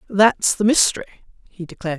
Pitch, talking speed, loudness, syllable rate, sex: 195 Hz, 150 wpm, -17 LUFS, 6.4 syllables/s, female